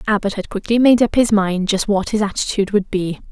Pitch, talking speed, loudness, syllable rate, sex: 205 Hz, 255 wpm, -17 LUFS, 6.0 syllables/s, female